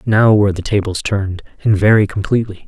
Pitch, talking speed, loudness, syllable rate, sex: 100 Hz, 180 wpm, -15 LUFS, 6.3 syllables/s, male